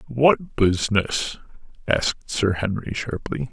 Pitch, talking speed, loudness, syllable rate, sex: 110 Hz, 100 wpm, -22 LUFS, 3.9 syllables/s, male